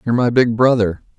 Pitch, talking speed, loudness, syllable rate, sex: 115 Hz, 205 wpm, -15 LUFS, 6.5 syllables/s, male